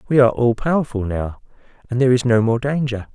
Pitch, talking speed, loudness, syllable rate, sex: 120 Hz, 210 wpm, -19 LUFS, 6.5 syllables/s, male